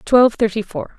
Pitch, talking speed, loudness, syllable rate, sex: 205 Hz, 185 wpm, -16 LUFS, 5.3 syllables/s, female